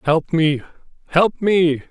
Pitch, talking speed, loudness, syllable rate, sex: 165 Hz, 125 wpm, -18 LUFS, 3.4 syllables/s, male